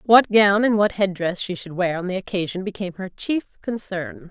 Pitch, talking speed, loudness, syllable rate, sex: 195 Hz, 225 wpm, -21 LUFS, 5.3 syllables/s, female